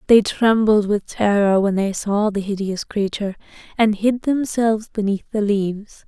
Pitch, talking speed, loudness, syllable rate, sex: 210 Hz, 160 wpm, -19 LUFS, 4.7 syllables/s, female